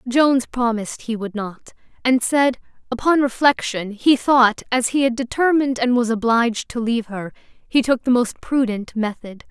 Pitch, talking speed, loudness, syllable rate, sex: 240 Hz, 170 wpm, -19 LUFS, 4.8 syllables/s, female